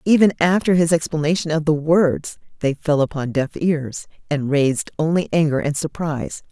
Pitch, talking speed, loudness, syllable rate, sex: 155 Hz, 165 wpm, -19 LUFS, 5.0 syllables/s, female